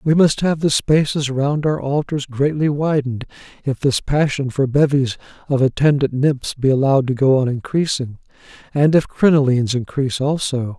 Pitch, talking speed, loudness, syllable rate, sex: 140 Hz, 155 wpm, -18 LUFS, 5.0 syllables/s, male